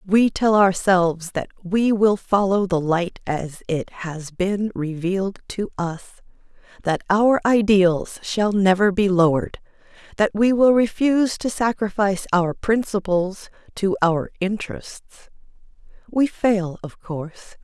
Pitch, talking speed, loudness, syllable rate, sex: 195 Hz, 130 wpm, -20 LUFS, 4.2 syllables/s, female